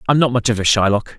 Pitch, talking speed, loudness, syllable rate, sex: 115 Hz, 305 wpm, -16 LUFS, 6.9 syllables/s, male